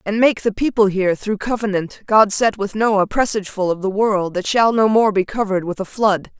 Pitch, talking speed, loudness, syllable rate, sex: 205 Hz, 225 wpm, -18 LUFS, 5.3 syllables/s, female